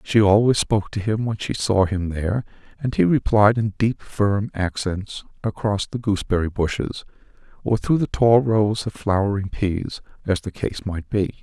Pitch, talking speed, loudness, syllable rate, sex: 105 Hz, 180 wpm, -21 LUFS, 4.7 syllables/s, male